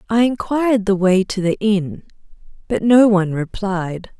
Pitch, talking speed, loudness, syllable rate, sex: 205 Hz, 155 wpm, -17 LUFS, 4.6 syllables/s, female